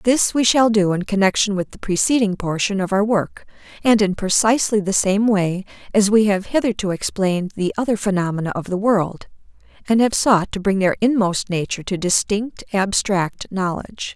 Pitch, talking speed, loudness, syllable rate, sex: 200 Hz, 180 wpm, -19 LUFS, 5.2 syllables/s, female